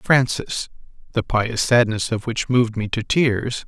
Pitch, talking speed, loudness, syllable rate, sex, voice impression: 115 Hz, 165 wpm, -20 LUFS, 4.1 syllables/s, male, very masculine, very middle-aged, thick, slightly tensed, slightly powerful, slightly bright, soft, slightly muffled, fluent, raspy, cool, intellectual, slightly refreshing, sincere, slightly calm, mature, friendly, reassuring, very unique, very elegant, slightly wild, slightly sweet, lively, slightly strict, slightly modest